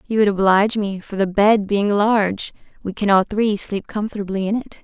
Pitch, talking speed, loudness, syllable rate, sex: 200 Hz, 210 wpm, -18 LUFS, 5.4 syllables/s, female